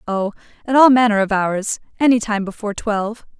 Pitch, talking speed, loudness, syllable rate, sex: 220 Hz, 160 wpm, -17 LUFS, 5.8 syllables/s, female